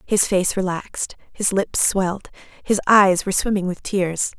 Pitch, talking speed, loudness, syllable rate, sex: 190 Hz, 165 wpm, -20 LUFS, 4.7 syllables/s, female